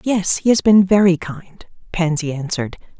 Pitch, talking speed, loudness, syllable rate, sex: 180 Hz, 160 wpm, -16 LUFS, 4.9 syllables/s, female